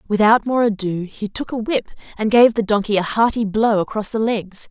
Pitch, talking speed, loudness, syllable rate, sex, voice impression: 215 Hz, 215 wpm, -18 LUFS, 5.1 syllables/s, female, feminine, adult-like, slightly relaxed, powerful, clear, raspy, intellectual, friendly, lively, slightly intense, sharp